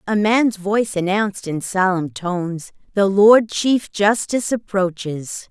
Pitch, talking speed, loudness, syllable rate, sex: 195 Hz, 130 wpm, -18 LUFS, 4.1 syllables/s, female